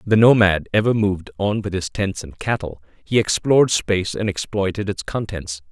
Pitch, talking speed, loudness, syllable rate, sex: 100 Hz, 180 wpm, -20 LUFS, 5.2 syllables/s, male